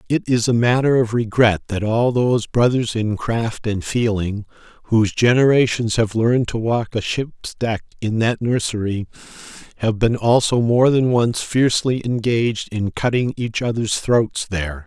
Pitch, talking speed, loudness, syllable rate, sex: 115 Hz, 160 wpm, -19 LUFS, 4.6 syllables/s, male